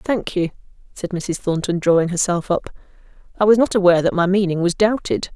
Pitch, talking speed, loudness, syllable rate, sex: 185 Hz, 190 wpm, -18 LUFS, 5.7 syllables/s, female